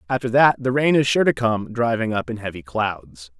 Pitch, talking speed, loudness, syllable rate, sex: 115 Hz, 230 wpm, -20 LUFS, 5.1 syllables/s, male